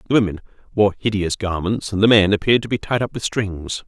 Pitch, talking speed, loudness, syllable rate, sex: 100 Hz, 230 wpm, -19 LUFS, 6.1 syllables/s, male